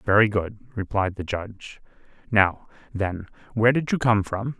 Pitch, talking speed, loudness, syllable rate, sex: 105 Hz, 155 wpm, -24 LUFS, 4.8 syllables/s, male